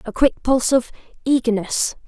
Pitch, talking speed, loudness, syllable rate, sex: 245 Hz, 115 wpm, -19 LUFS, 5.2 syllables/s, female